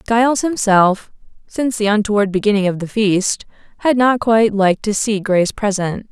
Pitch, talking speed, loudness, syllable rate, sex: 210 Hz, 165 wpm, -16 LUFS, 5.3 syllables/s, female